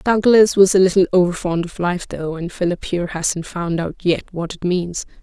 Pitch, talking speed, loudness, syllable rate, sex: 180 Hz, 205 wpm, -18 LUFS, 5.0 syllables/s, female